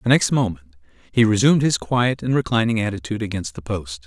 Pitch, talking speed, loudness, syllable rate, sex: 110 Hz, 205 wpm, -20 LUFS, 6.3 syllables/s, male